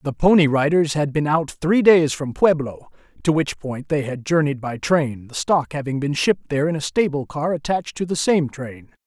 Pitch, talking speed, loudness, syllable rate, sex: 150 Hz, 220 wpm, -20 LUFS, 5.1 syllables/s, male